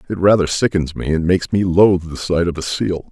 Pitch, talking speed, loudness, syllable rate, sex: 90 Hz, 250 wpm, -17 LUFS, 5.9 syllables/s, male